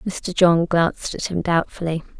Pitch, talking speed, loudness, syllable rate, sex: 170 Hz, 165 wpm, -20 LUFS, 4.7 syllables/s, female